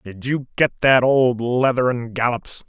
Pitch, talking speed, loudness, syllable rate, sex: 125 Hz, 180 wpm, -19 LUFS, 4.3 syllables/s, male